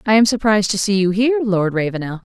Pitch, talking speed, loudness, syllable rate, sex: 195 Hz, 235 wpm, -17 LUFS, 6.5 syllables/s, female